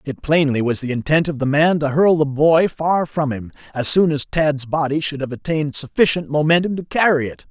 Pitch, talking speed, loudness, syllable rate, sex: 150 Hz, 225 wpm, -18 LUFS, 5.3 syllables/s, male